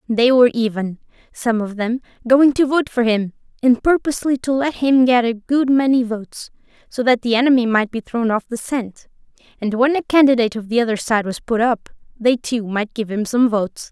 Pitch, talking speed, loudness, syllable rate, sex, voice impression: 240 Hz, 210 wpm, -18 LUFS, 5.4 syllables/s, female, very feminine, gender-neutral, very young, very thin, very tensed, slightly powerful, very bright, hard, very clear, very fluent, very cute, intellectual, very refreshing, sincere, calm, very friendly, very reassuring, very unique, elegant, very wild, very lively, slightly kind, intense, sharp, very light